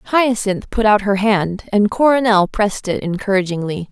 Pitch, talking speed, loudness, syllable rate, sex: 205 Hz, 155 wpm, -16 LUFS, 4.7 syllables/s, female